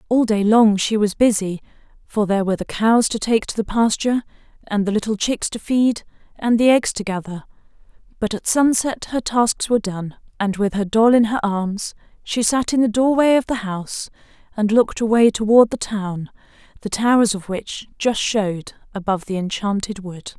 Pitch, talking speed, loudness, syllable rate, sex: 215 Hz, 190 wpm, -19 LUFS, 5.2 syllables/s, female